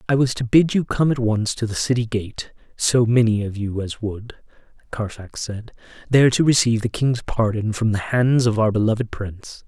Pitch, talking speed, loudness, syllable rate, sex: 115 Hz, 205 wpm, -20 LUFS, 5.1 syllables/s, male